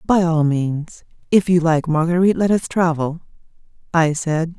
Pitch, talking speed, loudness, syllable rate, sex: 165 Hz, 155 wpm, -18 LUFS, 4.6 syllables/s, female